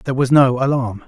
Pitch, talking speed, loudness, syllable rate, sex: 130 Hz, 220 wpm, -16 LUFS, 6.3 syllables/s, male